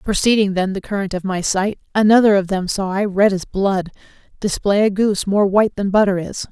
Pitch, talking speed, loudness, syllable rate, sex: 200 Hz, 210 wpm, -17 LUFS, 5.6 syllables/s, female